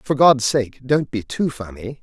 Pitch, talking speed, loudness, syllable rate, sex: 125 Hz, 210 wpm, -19 LUFS, 4.1 syllables/s, male